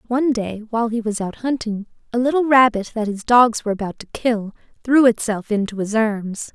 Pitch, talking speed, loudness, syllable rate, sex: 225 Hz, 200 wpm, -19 LUFS, 5.5 syllables/s, female